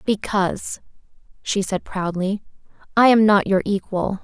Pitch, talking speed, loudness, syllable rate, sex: 200 Hz, 130 wpm, -20 LUFS, 4.4 syllables/s, female